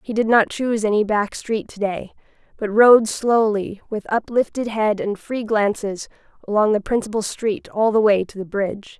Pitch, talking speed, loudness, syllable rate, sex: 215 Hz, 185 wpm, -20 LUFS, 4.8 syllables/s, female